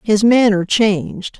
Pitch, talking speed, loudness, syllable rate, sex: 210 Hz, 130 wpm, -14 LUFS, 3.9 syllables/s, female